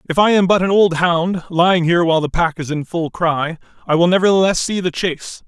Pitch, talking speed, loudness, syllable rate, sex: 175 Hz, 240 wpm, -16 LUFS, 5.9 syllables/s, male